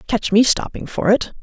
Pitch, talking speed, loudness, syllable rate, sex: 215 Hz, 210 wpm, -17 LUFS, 5.0 syllables/s, female